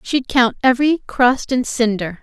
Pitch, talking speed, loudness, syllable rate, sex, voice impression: 245 Hz, 160 wpm, -17 LUFS, 4.5 syllables/s, female, feminine, very adult-like, clear, slightly intellectual, slightly elegant, slightly strict